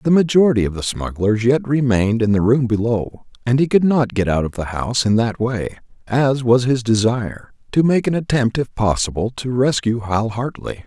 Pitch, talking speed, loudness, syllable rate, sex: 120 Hz, 205 wpm, -18 LUFS, 5.2 syllables/s, male